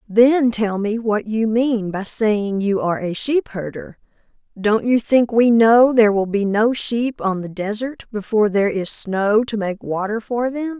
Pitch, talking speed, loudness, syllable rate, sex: 220 Hz, 195 wpm, -18 LUFS, 4.3 syllables/s, female